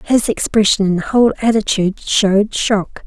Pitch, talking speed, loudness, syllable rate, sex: 210 Hz, 135 wpm, -15 LUFS, 5.0 syllables/s, female